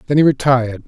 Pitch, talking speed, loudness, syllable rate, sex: 130 Hz, 205 wpm, -15 LUFS, 7.4 syllables/s, male